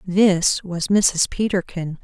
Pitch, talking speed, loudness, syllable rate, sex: 185 Hz, 120 wpm, -19 LUFS, 3.1 syllables/s, female